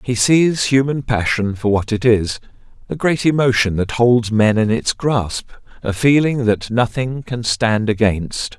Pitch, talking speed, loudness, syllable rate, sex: 115 Hz, 170 wpm, -17 LUFS, 4.0 syllables/s, male